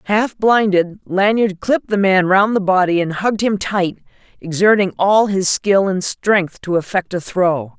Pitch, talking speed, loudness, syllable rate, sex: 190 Hz, 175 wpm, -16 LUFS, 4.4 syllables/s, female